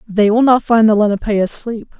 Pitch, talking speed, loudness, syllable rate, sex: 220 Hz, 210 wpm, -14 LUFS, 5.4 syllables/s, female